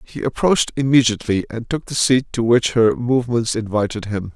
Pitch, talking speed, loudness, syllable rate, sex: 115 Hz, 180 wpm, -18 LUFS, 5.5 syllables/s, male